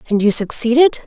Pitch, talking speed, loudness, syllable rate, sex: 240 Hz, 170 wpm, -13 LUFS, 5.8 syllables/s, female